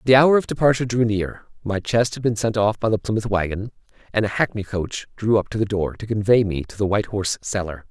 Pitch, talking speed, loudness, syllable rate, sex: 105 Hz, 250 wpm, -21 LUFS, 6.1 syllables/s, male